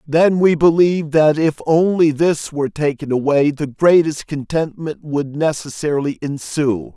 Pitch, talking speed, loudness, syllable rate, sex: 150 Hz, 140 wpm, -17 LUFS, 4.5 syllables/s, male